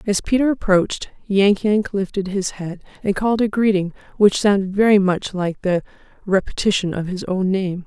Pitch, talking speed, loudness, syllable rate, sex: 195 Hz, 175 wpm, -19 LUFS, 5.1 syllables/s, female